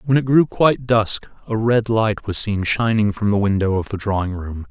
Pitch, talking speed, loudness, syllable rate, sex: 110 Hz, 230 wpm, -19 LUFS, 5.1 syllables/s, male